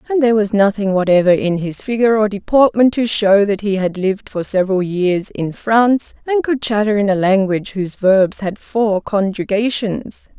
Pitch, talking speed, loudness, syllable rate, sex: 205 Hz, 185 wpm, -16 LUFS, 5.1 syllables/s, female